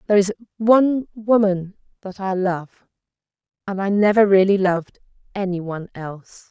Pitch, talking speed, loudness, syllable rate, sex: 195 Hz, 140 wpm, -19 LUFS, 5.3 syllables/s, female